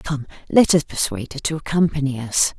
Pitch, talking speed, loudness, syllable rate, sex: 145 Hz, 185 wpm, -20 LUFS, 5.7 syllables/s, female